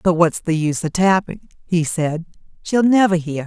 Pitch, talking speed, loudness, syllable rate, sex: 175 Hz, 190 wpm, -18 LUFS, 5.1 syllables/s, female